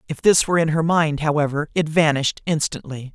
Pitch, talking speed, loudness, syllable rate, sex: 155 Hz, 190 wpm, -19 LUFS, 5.9 syllables/s, male